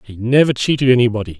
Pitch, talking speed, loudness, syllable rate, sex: 120 Hz, 170 wpm, -15 LUFS, 7.2 syllables/s, male